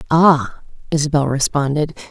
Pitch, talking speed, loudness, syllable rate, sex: 150 Hz, 85 wpm, -17 LUFS, 4.7 syllables/s, female